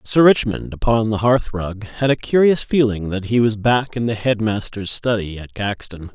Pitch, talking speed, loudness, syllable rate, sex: 110 Hz, 195 wpm, -19 LUFS, 4.6 syllables/s, male